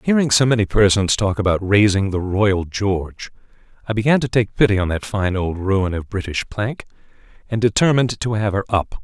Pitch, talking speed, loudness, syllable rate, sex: 105 Hz, 190 wpm, -18 LUFS, 5.4 syllables/s, male